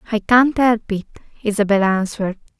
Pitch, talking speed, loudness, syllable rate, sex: 215 Hz, 140 wpm, -18 LUFS, 5.5 syllables/s, female